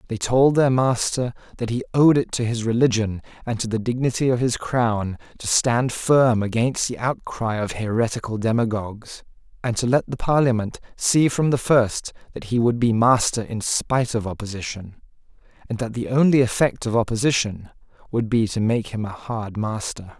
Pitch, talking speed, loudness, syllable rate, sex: 115 Hz, 180 wpm, -21 LUFS, 5.0 syllables/s, male